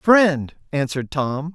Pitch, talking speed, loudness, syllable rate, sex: 155 Hz, 115 wpm, -21 LUFS, 3.6 syllables/s, male